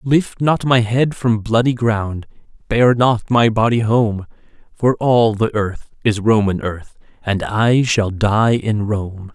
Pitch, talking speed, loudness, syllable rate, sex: 110 Hz, 160 wpm, -17 LUFS, 3.5 syllables/s, male